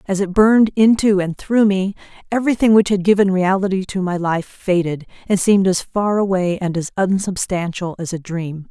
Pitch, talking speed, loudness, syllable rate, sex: 190 Hz, 185 wpm, -17 LUFS, 5.2 syllables/s, female